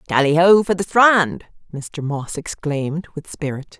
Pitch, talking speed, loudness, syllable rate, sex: 160 Hz, 160 wpm, -18 LUFS, 4.2 syllables/s, female